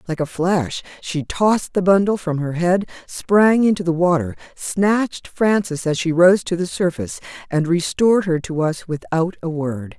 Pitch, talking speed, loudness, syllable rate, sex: 175 Hz, 180 wpm, -19 LUFS, 4.6 syllables/s, female